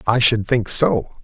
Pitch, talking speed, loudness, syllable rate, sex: 115 Hz, 195 wpm, -17 LUFS, 3.9 syllables/s, male